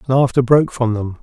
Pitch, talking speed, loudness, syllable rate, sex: 125 Hz, 195 wpm, -16 LUFS, 5.8 syllables/s, male